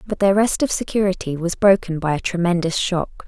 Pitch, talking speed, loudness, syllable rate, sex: 185 Hz, 200 wpm, -19 LUFS, 5.4 syllables/s, female